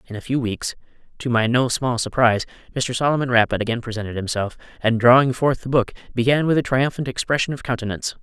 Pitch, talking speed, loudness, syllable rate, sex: 120 Hz, 195 wpm, -20 LUFS, 6.4 syllables/s, male